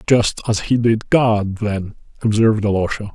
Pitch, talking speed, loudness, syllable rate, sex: 110 Hz, 150 wpm, -18 LUFS, 4.5 syllables/s, male